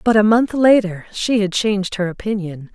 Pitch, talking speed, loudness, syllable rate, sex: 205 Hz, 195 wpm, -17 LUFS, 5.0 syllables/s, female